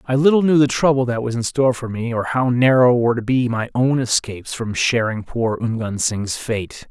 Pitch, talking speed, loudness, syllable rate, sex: 120 Hz, 225 wpm, -18 LUFS, 5.2 syllables/s, male